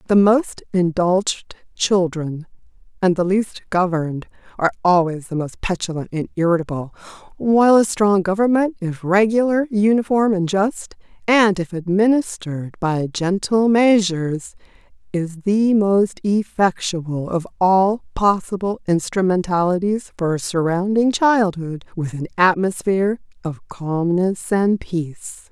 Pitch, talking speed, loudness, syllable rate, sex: 190 Hz, 115 wpm, -19 LUFS, 4.2 syllables/s, female